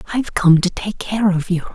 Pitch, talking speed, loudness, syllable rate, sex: 190 Hz, 240 wpm, -17 LUFS, 5.8 syllables/s, female